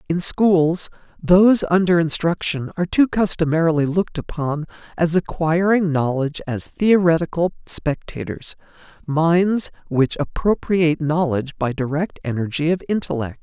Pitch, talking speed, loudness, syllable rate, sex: 165 Hz, 110 wpm, -19 LUFS, 4.7 syllables/s, male